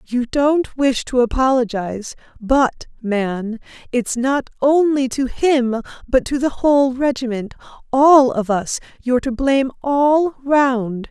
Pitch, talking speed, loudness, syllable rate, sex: 255 Hz, 125 wpm, -17 LUFS, 3.9 syllables/s, female